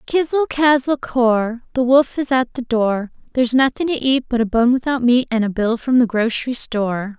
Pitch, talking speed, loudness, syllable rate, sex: 245 Hz, 210 wpm, -18 LUFS, 5.1 syllables/s, female